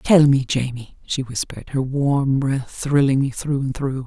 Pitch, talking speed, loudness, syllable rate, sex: 135 Hz, 190 wpm, -20 LUFS, 4.4 syllables/s, female